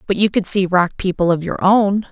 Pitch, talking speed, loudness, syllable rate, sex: 190 Hz, 255 wpm, -16 LUFS, 5.2 syllables/s, female